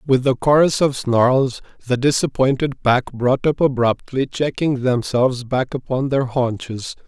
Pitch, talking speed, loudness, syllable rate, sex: 130 Hz, 145 wpm, -19 LUFS, 4.3 syllables/s, male